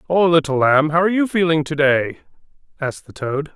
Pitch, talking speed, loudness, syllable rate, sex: 155 Hz, 185 wpm, -18 LUFS, 5.7 syllables/s, male